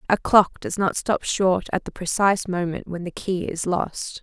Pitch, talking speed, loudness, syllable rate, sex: 185 Hz, 215 wpm, -22 LUFS, 4.5 syllables/s, female